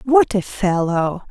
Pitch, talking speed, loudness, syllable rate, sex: 205 Hz, 140 wpm, -18 LUFS, 3.5 syllables/s, female